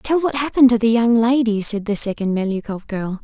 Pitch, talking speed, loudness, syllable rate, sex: 225 Hz, 225 wpm, -18 LUFS, 5.7 syllables/s, female